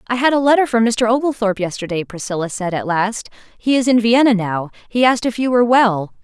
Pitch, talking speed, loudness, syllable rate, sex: 225 Hz, 220 wpm, -16 LUFS, 6.1 syllables/s, female